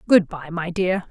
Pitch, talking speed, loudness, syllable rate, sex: 175 Hz, 220 wpm, -22 LUFS, 4.2 syllables/s, female